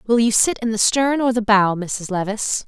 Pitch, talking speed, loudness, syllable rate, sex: 220 Hz, 245 wpm, -18 LUFS, 4.9 syllables/s, female